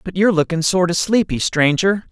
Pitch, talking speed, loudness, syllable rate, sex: 180 Hz, 200 wpm, -17 LUFS, 5.5 syllables/s, male